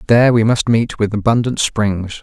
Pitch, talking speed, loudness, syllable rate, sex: 110 Hz, 190 wpm, -15 LUFS, 4.9 syllables/s, male